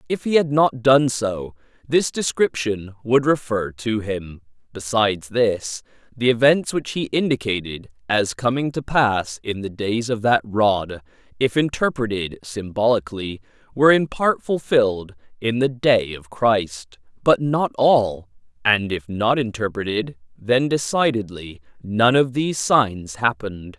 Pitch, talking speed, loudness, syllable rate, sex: 115 Hz, 140 wpm, -20 LUFS, 4.1 syllables/s, male